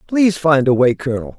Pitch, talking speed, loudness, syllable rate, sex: 150 Hz, 215 wpm, -15 LUFS, 6.4 syllables/s, male